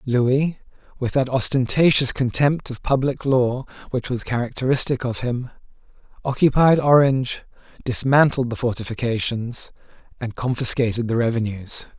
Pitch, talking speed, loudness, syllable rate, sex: 125 Hz, 110 wpm, -21 LUFS, 5.0 syllables/s, male